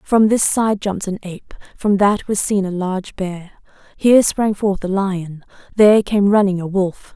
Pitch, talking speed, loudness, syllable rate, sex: 195 Hz, 195 wpm, -17 LUFS, 4.8 syllables/s, female